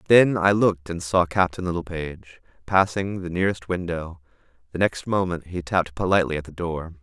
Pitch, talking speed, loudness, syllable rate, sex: 85 Hz, 170 wpm, -23 LUFS, 5.7 syllables/s, male